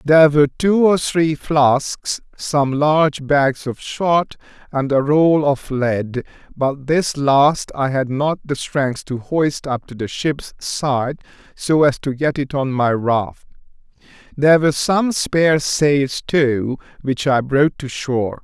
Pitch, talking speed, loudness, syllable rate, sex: 140 Hz, 165 wpm, -18 LUFS, 3.6 syllables/s, male